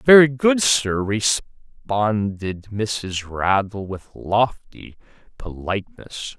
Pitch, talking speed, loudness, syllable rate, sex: 110 Hz, 85 wpm, -20 LUFS, 2.9 syllables/s, male